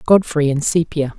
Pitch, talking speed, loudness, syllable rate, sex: 155 Hz, 150 wpm, -17 LUFS, 4.8 syllables/s, female